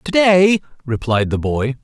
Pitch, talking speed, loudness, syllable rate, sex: 150 Hz, 165 wpm, -16 LUFS, 4.0 syllables/s, male